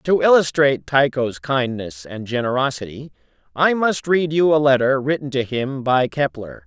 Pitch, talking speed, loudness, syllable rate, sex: 135 Hz, 155 wpm, -19 LUFS, 4.7 syllables/s, male